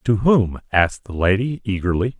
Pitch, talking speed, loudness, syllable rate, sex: 105 Hz, 165 wpm, -19 LUFS, 5.1 syllables/s, male